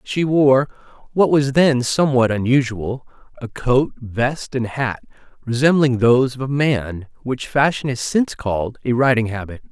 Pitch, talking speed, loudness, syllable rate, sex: 130 Hz, 155 wpm, -18 LUFS, 4.5 syllables/s, male